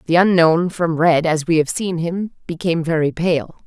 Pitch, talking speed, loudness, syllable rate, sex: 165 Hz, 195 wpm, -18 LUFS, 4.6 syllables/s, female